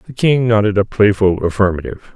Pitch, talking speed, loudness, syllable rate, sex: 105 Hz, 165 wpm, -15 LUFS, 6.0 syllables/s, male